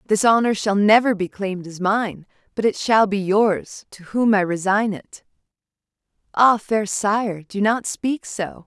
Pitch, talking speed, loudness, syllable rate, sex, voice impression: 205 Hz, 175 wpm, -20 LUFS, 4.1 syllables/s, female, feminine, slightly young, slightly adult-like, thin, tensed, powerful, bright, hard, clear, fluent, cute, slightly cool, intellectual, refreshing, slightly sincere, calm, friendly, very reassuring, elegant, slightly wild, slightly sweet, kind, slightly modest